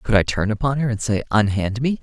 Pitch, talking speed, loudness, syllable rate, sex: 115 Hz, 265 wpm, -20 LUFS, 6.0 syllables/s, male